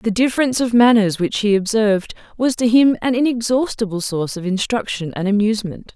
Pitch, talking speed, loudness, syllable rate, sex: 220 Hz, 170 wpm, -17 LUFS, 5.8 syllables/s, female